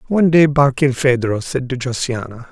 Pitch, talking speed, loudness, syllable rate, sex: 135 Hz, 145 wpm, -16 LUFS, 5.2 syllables/s, male